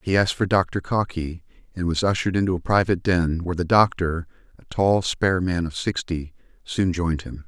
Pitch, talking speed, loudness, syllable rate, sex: 90 Hz, 195 wpm, -23 LUFS, 5.9 syllables/s, male